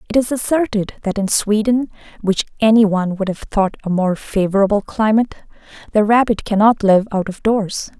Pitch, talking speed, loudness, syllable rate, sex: 210 Hz, 175 wpm, -17 LUFS, 5.4 syllables/s, female